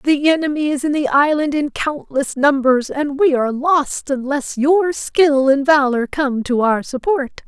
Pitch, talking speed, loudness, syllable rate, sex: 285 Hz, 175 wpm, -17 LUFS, 4.2 syllables/s, female